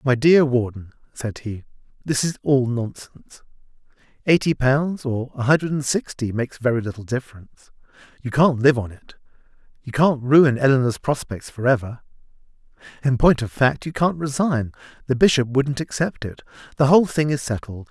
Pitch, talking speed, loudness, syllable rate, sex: 130 Hz, 160 wpm, -20 LUFS, 5.2 syllables/s, male